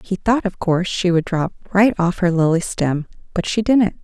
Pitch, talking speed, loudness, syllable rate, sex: 185 Hz, 225 wpm, -18 LUFS, 4.6 syllables/s, female